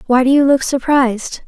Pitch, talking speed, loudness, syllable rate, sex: 260 Hz, 205 wpm, -14 LUFS, 5.4 syllables/s, female